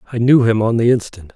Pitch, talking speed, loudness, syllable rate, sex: 115 Hz, 265 wpm, -14 LUFS, 6.4 syllables/s, male